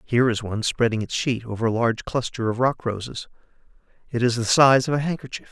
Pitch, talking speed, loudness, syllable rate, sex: 120 Hz, 220 wpm, -22 LUFS, 6.3 syllables/s, male